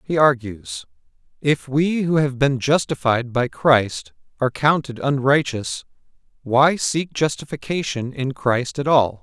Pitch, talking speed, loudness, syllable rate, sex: 135 Hz, 130 wpm, -20 LUFS, 4.0 syllables/s, male